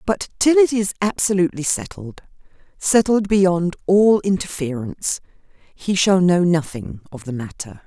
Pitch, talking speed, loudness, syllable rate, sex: 175 Hz, 120 wpm, -18 LUFS, 4.5 syllables/s, female